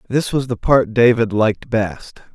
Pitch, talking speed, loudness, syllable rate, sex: 115 Hz, 180 wpm, -17 LUFS, 4.4 syllables/s, male